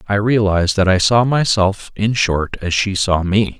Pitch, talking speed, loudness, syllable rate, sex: 100 Hz, 200 wpm, -16 LUFS, 4.5 syllables/s, male